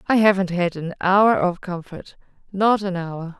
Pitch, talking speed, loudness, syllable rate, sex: 185 Hz, 160 wpm, -20 LUFS, 4.2 syllables/s, female